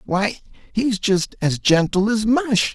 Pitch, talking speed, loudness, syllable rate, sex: 210 Hz, 155 wpm, -19 LUFS, 3.4 syllables/s, male